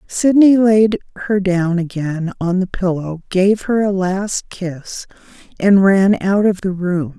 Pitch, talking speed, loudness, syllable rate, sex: 190 Hz, 160 wpm, -16 LUFS, 3.6 syllables/s, female